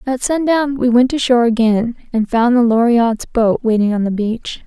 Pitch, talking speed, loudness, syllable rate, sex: 240 Hz, 205 wpm, -15 LUFS, 5.1 syllables/s, female